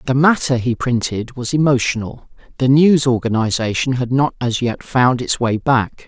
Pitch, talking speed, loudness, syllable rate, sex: 125 Hz, 170 wpm, -17 LUFS, 4.7 syllables/s, male